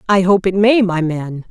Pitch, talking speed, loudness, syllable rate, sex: 190 Hz, 240 wpm, -14 LUFS, 4.6 syllables/s, female